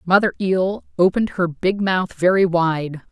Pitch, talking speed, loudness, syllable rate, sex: 165 Hz, 155 wpm, -19 LUFS, 4.4 syllables/s, female